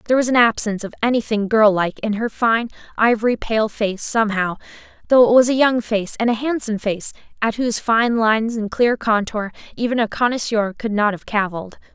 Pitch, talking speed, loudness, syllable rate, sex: 220 Hz, 195 wpm, -18 LUFS, 5.8 syllables/s, female